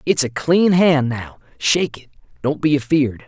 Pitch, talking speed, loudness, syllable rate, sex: 140 Hz, 185 wpm, -18 LUFS, 4.5 syllables/s, male